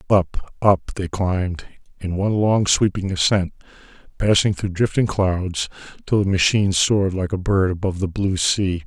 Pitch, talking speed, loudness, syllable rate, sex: 95 Hz, 160 wpm, -20 LUFS, 4.8 syllables/s, male